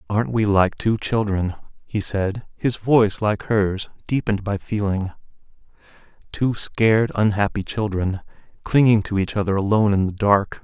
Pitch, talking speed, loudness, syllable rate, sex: 105 Hz, 145 wpm, -21 LUFS, 4.8 syllables/s, male